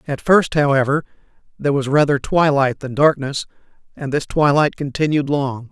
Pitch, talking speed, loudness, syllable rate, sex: 140 Hz, 145 wpm, -17 LUFS, 5.1 syllables/s, male